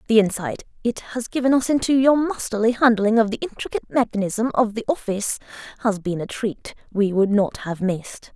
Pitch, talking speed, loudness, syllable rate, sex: 220 Hz, 185 wpm, -21 LUFS, 5.5 syllables/s, female